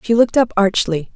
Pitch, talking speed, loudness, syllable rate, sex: 210 Hz, 210 wpm, -16 LUFS, 5.9 syllables/s, female